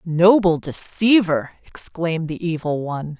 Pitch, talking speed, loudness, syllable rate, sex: 170 Hz, 115 wpm, -19 LUFS, 4.4 syllables/s, female